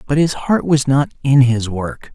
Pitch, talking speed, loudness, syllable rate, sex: 135 Hz, 225 wpm, -16 LUFS, 4.3 syllables/s, male